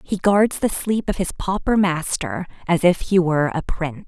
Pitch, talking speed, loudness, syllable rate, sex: 180 Hz, 205 wpm, -20 LUFS, 4.9 syllables/s, female